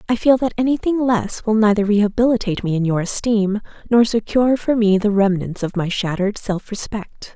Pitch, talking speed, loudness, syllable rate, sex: 215 Hz, 190 wpm, -18 LUFS, 5.6 syllables/s, female